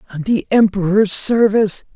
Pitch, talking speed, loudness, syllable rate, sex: 200 Hz, 125 wpm, -15 LUFS, 5.2 syllables/s, female